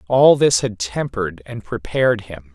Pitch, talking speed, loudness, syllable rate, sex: 110 Hz, 165 wpm, -18 LUFS, 4.7 syllables/s, male